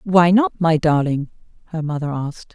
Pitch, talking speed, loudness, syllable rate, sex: 165 Hz, 165 wpm, -19 LUFS, 4.9 syllables/s, female